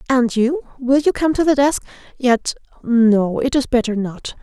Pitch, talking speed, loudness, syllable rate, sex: 255 Hz, 165 wpm, -17 LUFS, 4.4 syllables/s, female